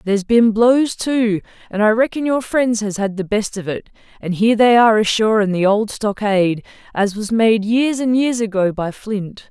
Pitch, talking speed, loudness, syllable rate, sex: 215 Hz, 210 wpm, -17 LUFS, 5.0 syllables/s, female